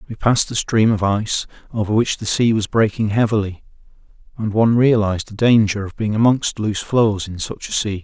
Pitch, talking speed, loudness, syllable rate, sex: 110 Hz, 200 wpm, -18 LUFS, 5.7 syllables/s, male